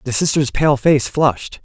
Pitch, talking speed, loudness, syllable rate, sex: 140 Hz, 185 wpm, -16 LUFS, 4.6 syllables/s, male